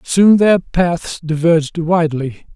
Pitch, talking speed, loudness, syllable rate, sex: 165 Hz, 120 wpm, -14 LUFS, 3.8 syllables/s, male